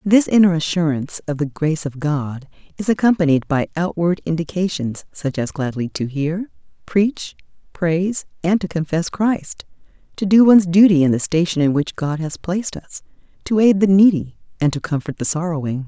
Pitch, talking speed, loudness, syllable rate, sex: 170 Hz, 175 wpm, -18 LUFS, 5.2 syllables/s, female